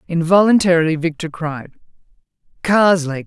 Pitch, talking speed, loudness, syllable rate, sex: 170 Hz, 75 wpm, -16 LUFS, 5.3 syllables/s, female